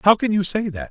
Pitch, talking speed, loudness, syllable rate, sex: 190 Hz, 330 wpm, -20 LUFS, 6.3 syllables/s, male